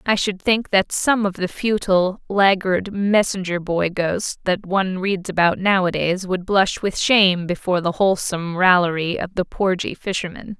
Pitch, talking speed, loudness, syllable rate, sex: 190 Hz, 165 wpm, -19 LUFS, 4.7 syllables/s, female